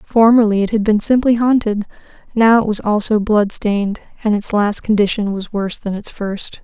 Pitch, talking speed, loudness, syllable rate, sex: 210 Hz, 190 wpm, -16 LUFS, 5.2 syllables/s, female